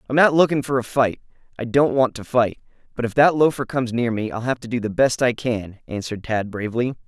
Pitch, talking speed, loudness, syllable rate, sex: 120 Hz, 235 wpm, -21 LUFS, 6.0 syllables/s, male